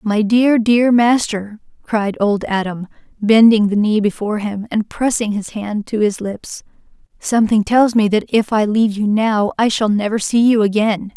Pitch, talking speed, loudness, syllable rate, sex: 215 Hz, 185 wpm, -16 LUFS, 4.6 syllables/s, female